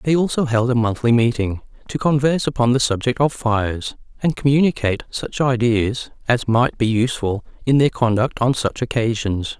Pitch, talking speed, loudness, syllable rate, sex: 120 Hz, 170 wpm, -19 LUFS, 5.3 syllables/s, male